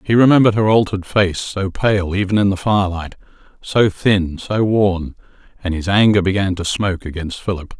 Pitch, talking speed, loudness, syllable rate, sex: 95 Hz, 175 wpm, -17 LUFS, 5.3 syllables/s, male